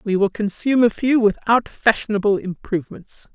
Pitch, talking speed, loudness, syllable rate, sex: 210 Hz, 145 wpm, -19 LUFS, 5.3 syllables/s, female